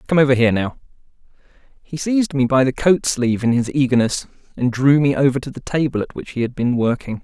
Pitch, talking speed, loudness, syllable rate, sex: 130 Hz, 225 wpm, -18 LUFS, 6.3 syllables/s, male